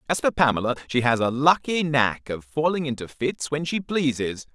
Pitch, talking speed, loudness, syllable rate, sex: 140 Hz, 200 wpm, -23 LUFS, 5.1 syllables/s, male